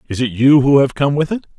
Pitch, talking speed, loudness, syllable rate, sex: 135 Hz, 300 wpm, -14 LUFS, 6.0 syllables/s, male